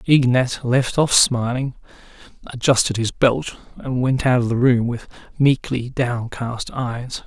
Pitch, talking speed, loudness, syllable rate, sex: 125 Hz, 140 wpm, -19 LUFS, 3.9 syllables/s, male